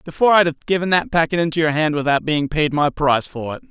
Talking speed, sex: 260 wpm, male